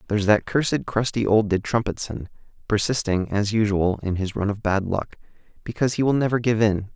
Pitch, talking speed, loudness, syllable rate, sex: 105 Hz, 190 wpm, -22 LUFS, 5.7 syllables/s, male